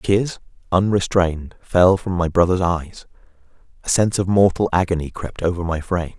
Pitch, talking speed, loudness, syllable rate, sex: 90 Hz, 155 wpm, -19 LUFS, 5.2 syllables/s, male